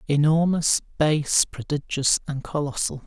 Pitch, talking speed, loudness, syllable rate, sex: 150 Hz, 100 wpm, -23 LUFS, 4.2 syllables/s, male